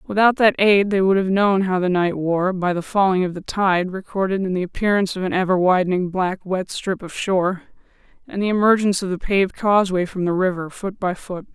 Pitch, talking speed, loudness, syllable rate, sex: 190 Hz, 225 wpm, -20 LUFS, 5.7 syllables/s, female